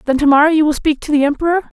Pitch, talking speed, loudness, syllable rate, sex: 300 Hz, 270 wpm, -14 LUFS, 7.6 syllables/s, female